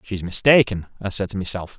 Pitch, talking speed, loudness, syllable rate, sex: 100 Hz, 200 wpm, -20 LUFS, 5.6 syllables/s, male